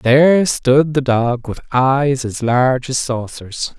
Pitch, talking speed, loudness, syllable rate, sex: 130 Hz, 160 wpm, -16 LUFS, 3.6 syllables/s, male